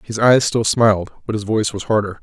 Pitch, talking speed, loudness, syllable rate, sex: 110 Hz, 240 wpm, -17 LUFS, 6.1 syllables/s, male